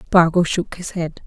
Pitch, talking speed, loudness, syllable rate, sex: 170 Hz, 190 wpm, -19 LUFS, 4.4 syllables/s, female